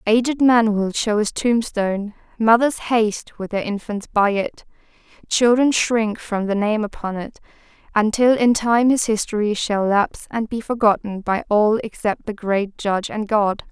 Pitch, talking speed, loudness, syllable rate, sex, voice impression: 215 Hz, 165 wpm, -19 LUFS, 4.5 syllables/s, female, very feminine, young, very thin, slightly relaxed, slightly weak, bright, soft, clear, fluent, cute, intellectual, very refreshing, sincere, very calm, very friendly, very reassuring, slightly unique, elegant, slightly wild, sweet, lively, kind, slightly modest, light